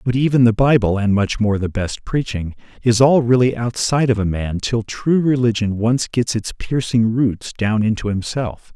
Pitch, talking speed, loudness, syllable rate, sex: 115 Hz, 190 wpm, -18 LUFS, 4.7 syllables/s, male